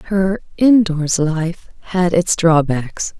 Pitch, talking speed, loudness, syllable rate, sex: 175 Hz, 130 wpm, -16 LUFS, 2.9 syllables/s, female